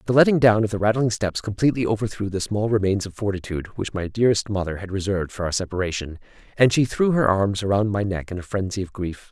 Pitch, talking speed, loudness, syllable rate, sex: 105 Hz, 230 wpm, -22 LUFS, 6.5 syllables/s, male